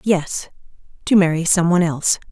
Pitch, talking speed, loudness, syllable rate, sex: 175 Hz, 130 wpm, -17 LUFS, 5.8 syllables/s, female